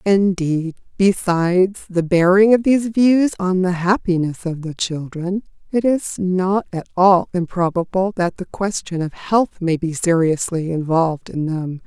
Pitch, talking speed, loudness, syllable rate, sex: 180 Hz, 150 wpm, -18 LUFS, 4.3 syllables/s, female